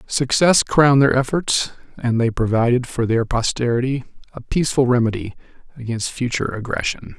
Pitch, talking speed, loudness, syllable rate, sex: 125 Hz, 135 wpm, -19 LUFS, 5.4 syllables/s, male